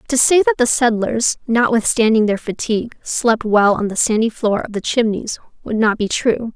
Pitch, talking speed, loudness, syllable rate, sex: 220 Hz, 190 wpm, -16 LUFS, 4.9 syllables/s, female